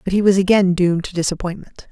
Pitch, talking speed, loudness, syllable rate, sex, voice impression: 185 Hz, 220 wpm, -17 LUFS, 6.6 syllables/s, female, feminine, slightly gender-neutral, adult-like, slightly middle-aged, thin, slightly tensed, slightly weak, slightly bright, slightly hard, slightly muffled, fluent, slightly cute, slightly intellectual, slightly refreshing, sincere, slightly calm, reassuring, elegant, strict, sharp, slightly modest